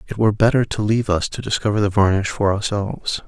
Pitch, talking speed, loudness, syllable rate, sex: 105 Hz, 220 wpm, -19 LUFS, 6.5 syllables/s, male